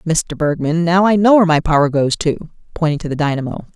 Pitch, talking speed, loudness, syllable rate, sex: 160 Hz, 225 wpm, -15 LUFS, 5.9 syllables/s, female